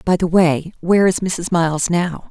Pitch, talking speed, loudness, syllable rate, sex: 175 Hz, 210 wpm, -17 LUFS, 4.8 syllables/s, female